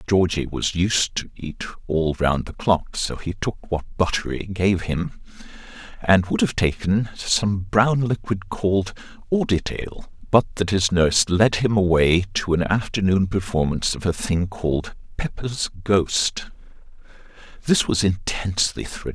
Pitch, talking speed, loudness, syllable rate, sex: 95 Hz, 145 wpm, -22 LUFS, 4.3 syllables/s, male